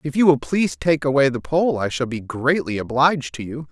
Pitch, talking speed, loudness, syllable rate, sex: 140 Hz, 240 wpm, -20 LUFS, 5.5 syllables/s, male